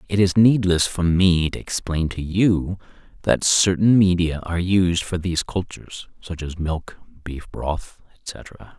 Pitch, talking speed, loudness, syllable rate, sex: 90 Hz, 155 wpm, -20 LUFS, 4.1 syllables/s, male